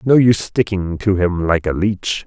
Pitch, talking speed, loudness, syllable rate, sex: 100 Hz, 210 wpm, -17 LUFS, 4.7 syllables/s, male